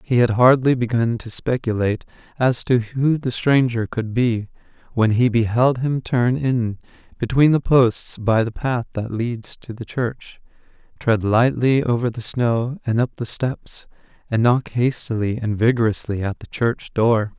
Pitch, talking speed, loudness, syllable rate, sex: 120 Hz, 165 wpm, -20 LUFS, 4.2 syllables/s, male